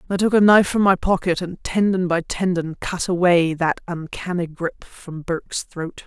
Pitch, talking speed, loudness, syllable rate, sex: 180 Hz, 190 wpm, -20 LUFS, 4.7 syllables/s, female